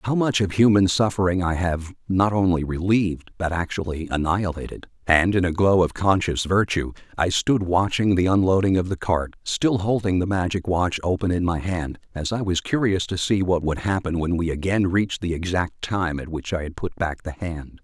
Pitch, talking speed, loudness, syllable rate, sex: 90 Hz, 200 wpm, -22 LUFS, 5.1 syllables/s, male